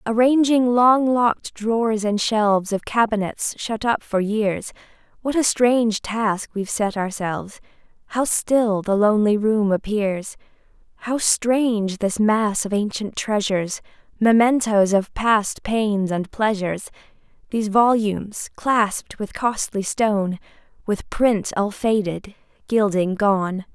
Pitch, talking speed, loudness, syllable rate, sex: 215 Hz, 125 wpm, -20 LUFS, 4.1 syllables/s, female